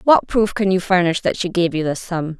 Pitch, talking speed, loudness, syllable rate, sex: 180 Hz, 275 wpm, -18 LUFS, 5.2 syllables/s, female